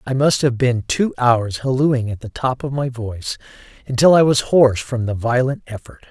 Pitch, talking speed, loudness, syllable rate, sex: 125 Hz, 205 wpm, -18 LUFS, 5.0 syllables/s, male